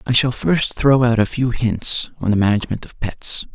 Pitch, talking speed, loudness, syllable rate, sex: 115 Hz, 220 wpm, -18 LUFS, 4.8 syllables/s, male